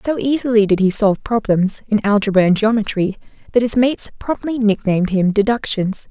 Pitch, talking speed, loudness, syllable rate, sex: 215 Hz, 165 wpm, -17 LUFS, 5.6 syllables/s, female